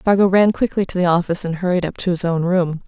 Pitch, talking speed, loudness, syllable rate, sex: 180 Hz, 270 wpm, -18 LUFS, 6.4 syllables/s, female